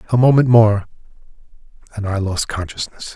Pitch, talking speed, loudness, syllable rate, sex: 110 Hz, 135 wpm, -17 LUFS, 5.4 syllables/s, male